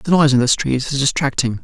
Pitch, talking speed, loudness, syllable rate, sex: 130 Hz, 260 wpm, -16 LUFS, 6.3 syllables/s, male